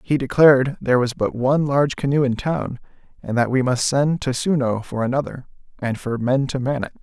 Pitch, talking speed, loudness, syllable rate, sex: 130 Hz, 215 wpm, -20 LUFS, 5.6 syllables/s, male